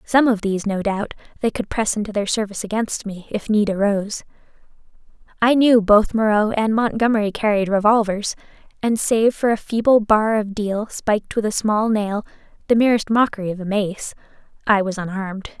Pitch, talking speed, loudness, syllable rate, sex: 210 Hz, 175 wpm, -19 LUFS, 5.4 syllables/s, female